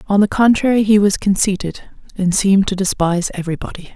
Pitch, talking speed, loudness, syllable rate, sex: 195 Hz, 165 wpm, -16 LUFS, 6.3 syllables/s, female